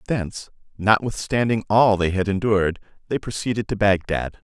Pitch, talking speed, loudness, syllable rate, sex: 105 Hz, 135 wpm, -21 LUFS, 5.3 syllables/s, male